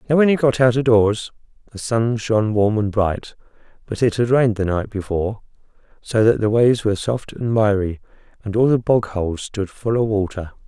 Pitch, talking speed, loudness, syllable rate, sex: 110 Hz, 210 wpm, -19 LUFS, 5.4 syllables/s, male